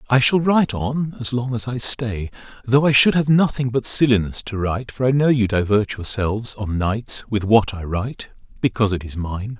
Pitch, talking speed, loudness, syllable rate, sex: 115 Hz, 215 wpm, -20 LUFS, 5.2 syllables/s, male